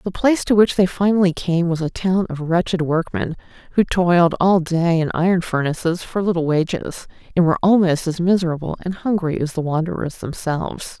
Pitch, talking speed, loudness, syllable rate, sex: 175 Hz, 185 wpm, -19 LUFS, 5.5 syllables/s, female